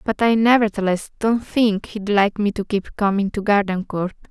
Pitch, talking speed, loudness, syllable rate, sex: 205 Hz, 180 wpm, -19 LUFS, 4.8 syllables/s, female